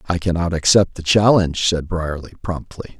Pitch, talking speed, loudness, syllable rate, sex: 85 Hz, 160 wpm, -18 LUFS, 5.2 syllables/s, male